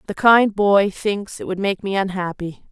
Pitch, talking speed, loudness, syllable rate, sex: 195 Hz, 200 wpm, -19 LUFS, 4.4 syllables/s, female